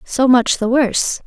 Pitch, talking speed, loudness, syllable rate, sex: 245 Hz, 190 wpm, -15 LUFS, 4.4 syllables/s, female